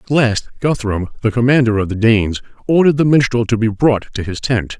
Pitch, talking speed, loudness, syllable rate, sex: 115 Hz, 215 wpm, -15 LUFS, 5.8 syllables/s, male